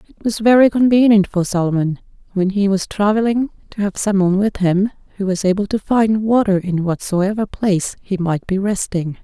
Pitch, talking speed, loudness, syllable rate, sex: 200 Hz, 190 wpm, -17 LUFS, 5.3 syllables/s, female